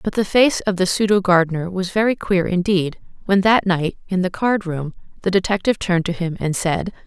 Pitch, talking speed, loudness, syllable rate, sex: 185 Hz, 210 wpm, -19 LUFS, 5.5 syllables/s, female